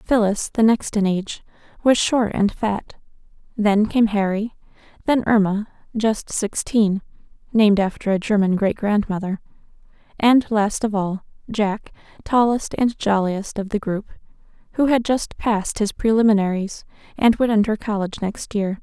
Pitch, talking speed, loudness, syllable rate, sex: 210 Hz, 145 wpm, -20 LUFS, 4.1 syllables/s, female